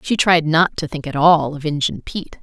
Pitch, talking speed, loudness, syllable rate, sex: 160 Hz, 250 wpm, -17 LUFS, 5.3 syllables/s, female